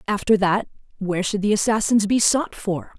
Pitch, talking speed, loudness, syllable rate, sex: 205 Hz, 180 wpm, -20 LUFS, 5.2 syllables/s, female